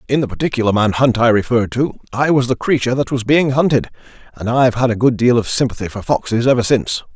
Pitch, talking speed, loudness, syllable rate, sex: 120 Hz, 235 wpm, -16 LUFS, 6.6 syllables/s, male